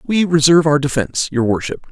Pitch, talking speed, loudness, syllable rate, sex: 150 Hz, 190 wpm, -15 LUFS, 6.0 syllables/s, male